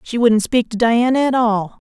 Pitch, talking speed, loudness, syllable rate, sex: 230 Hz, 220 wpm, -16 LUFS, 4.7 syllables/s, female